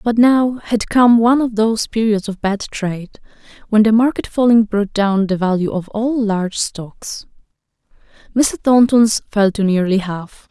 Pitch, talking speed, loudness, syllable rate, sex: 215 Hz, 165 wpm, -16 LUFS, 4.4 syllables/s, female